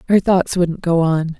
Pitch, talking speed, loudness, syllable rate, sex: 175 Hz, 215 wpm, -17 LUFS, 4.2 syllables/s, female